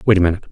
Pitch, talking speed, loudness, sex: 95 Hz, 350 wpm, -16 LUFS, male